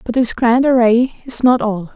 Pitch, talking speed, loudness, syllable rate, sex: 240 Hz, 215 wpm, -14 LUFS, 4.6 syllables/s, female